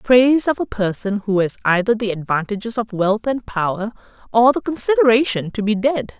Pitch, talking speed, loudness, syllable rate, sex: 225 Hz, 185 wpm, -18 LUFS, 5.4 syllables/s, female